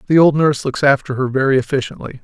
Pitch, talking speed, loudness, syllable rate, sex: 135 Hz, 215 wpm, -16 LUFS, 6.9 syllables/s, male